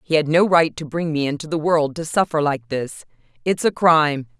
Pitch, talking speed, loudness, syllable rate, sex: 155 Hz, 230 wpm, -19 LUFS, 5.4 syllables/s, female